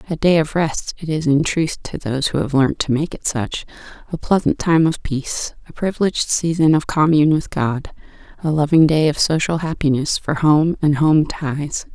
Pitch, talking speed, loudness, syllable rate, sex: 150 Hz, 200 wpm, -18 LUFS, 5.0 syllables/s, female